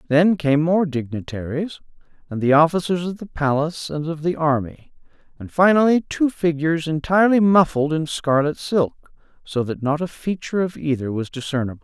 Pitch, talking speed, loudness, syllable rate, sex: 155 Hz, 160 wpm, -20 LUFS, 5.3 syllables/s, male